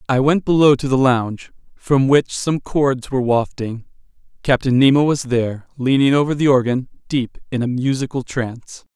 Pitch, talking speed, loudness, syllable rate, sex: 130 Hz, 170 wpm, -18 LUFS, 5.0 syllables/s, male